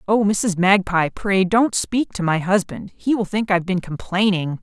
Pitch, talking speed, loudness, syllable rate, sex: 195 Hz, 195 wpm, -19 LUFS, 4.5 syllables/s, female